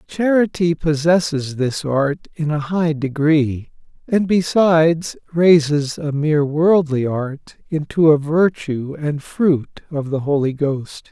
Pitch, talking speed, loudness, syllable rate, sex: 155 Hz, 130 wpm, -18 LUFS, 3.7 syllables/s, male